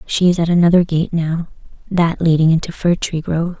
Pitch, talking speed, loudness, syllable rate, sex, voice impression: 170 Hz, 185 wpm, -16 LUFS, 5.5 syllables/s, female, feminine, adult-like, relaxed, slightly weak, slightly bright, soft, raspy, calm, friendly, reassuring, elegant, kind, modest